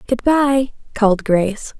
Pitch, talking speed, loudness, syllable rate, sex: 235 Hz, 135 wpm, -17 LUFS, 4.3 syllables/s, female